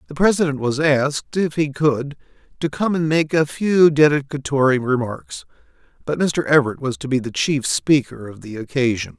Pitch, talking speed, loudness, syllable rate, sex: 145 Hz, 175 wpm, -19 LUFS, 5.0 syllables/s, male